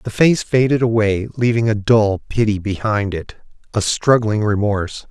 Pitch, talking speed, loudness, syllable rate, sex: 110 Hz, 155 wpm, -17 LUFS, 4.7 syllables/s, male